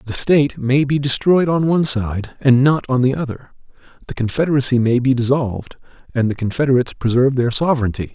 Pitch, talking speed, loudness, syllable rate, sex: 130 Hz, 175 wpm, -17 LUFS, 6.1 syllables/s, male